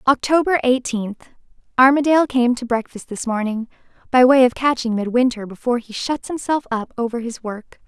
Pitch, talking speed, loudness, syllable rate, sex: 245 Hz, 150 wpm, -19 LUFS, 5.3 syllables/s, female